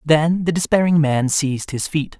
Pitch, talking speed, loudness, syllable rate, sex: 155 Hz, 190 wpm, -18 LUFS, 4.8 syllables/s, male